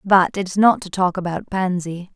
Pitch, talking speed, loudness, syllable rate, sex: 185 Hz, 195 wpm, -19 LUFS, 4.4 syllables/s, female